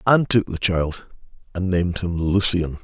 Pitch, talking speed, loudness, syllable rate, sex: 90 Hz, 170 wpm, -21 LUFS, 5.0 syllables/s, male